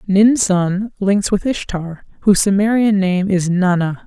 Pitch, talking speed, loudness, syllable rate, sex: 195 Hz, 145 wpm, -16 LUFS, 4.1 syllables/s, female